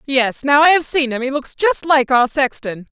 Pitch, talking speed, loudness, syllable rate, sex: 275 Hz, 240 wpm, -15 LUFS, 5.1 syllables/s, female